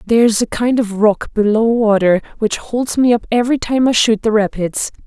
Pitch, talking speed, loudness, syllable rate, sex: 225 Hz, 200 wpm, -15 LUFS, 5.0 syllables/s, female